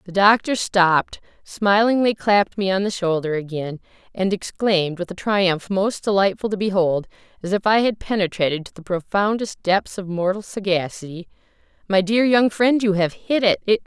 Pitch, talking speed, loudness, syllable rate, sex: 195 Hz, 170 wpm, -20 LUFS, 5.0 syllables/s, female